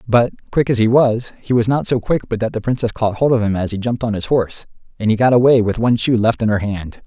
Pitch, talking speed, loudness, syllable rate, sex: 115 Hz, 295 wpm, -17 LUFS, 6.2 syllables/s, male